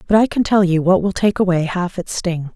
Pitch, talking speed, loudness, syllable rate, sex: 185 Hz, 280 wpm, -17 LUFS, 5.4 syllables/s, female